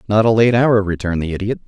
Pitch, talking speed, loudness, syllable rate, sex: 105 Hz, 250 wpm, -16 LUFS, 6.9 syllables/s, male